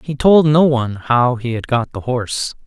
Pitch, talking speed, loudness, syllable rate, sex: 130 Hz, 225 wpm, -16 LUFS, 4.8 syllables/s, male